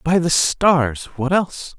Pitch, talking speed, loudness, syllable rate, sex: 155 Hz, 170 wpm, -18 LUFS, 3.6 syllables/s, male